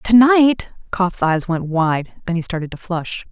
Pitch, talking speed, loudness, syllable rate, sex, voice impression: 190 Hz, 200 wpm, -18 LUFS, 4.0 syllables/s, female, feminine, adult-like, tensed, slightly powerful, slightly hard, clear, fluent, intellectual, calm, elegant, slightly lively, slightly strict, sharp